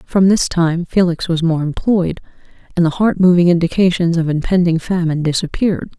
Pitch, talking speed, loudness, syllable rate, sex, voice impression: 175 Hz, 160 wpm, -15 LUFS, 5.5 syllables/s, female, very feminine, very adult-like, slightly thin, slightly relaxed, slightly weak, dark, slightly soft, muffled, slightly fluent, cool, very intellectual, slightly refreshing, sincere, very calm, very friendly, very reassuring, unique, very elegant, slightly wild, very sweet, kind, modest